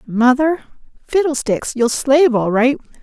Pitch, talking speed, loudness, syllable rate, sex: 265 Hz, 120 wpm, -16 LUFS, 4.6 syllables/s, female